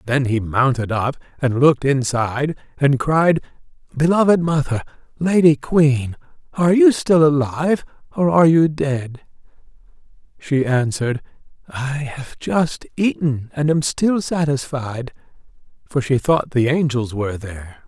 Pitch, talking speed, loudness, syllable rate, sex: 140 Hz, 130 wpm, -18 LUFS, 4.4 syllables/s, male